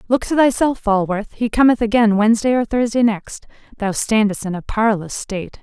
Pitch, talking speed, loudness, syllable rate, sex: 220 Hz, 180 wpm, -17 LUFS, 5.3 syllables/s, female